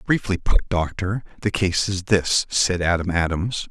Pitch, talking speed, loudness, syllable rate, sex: 95 Hz, 160 wpm, -22 LUFS, 4.3 syllables/s, male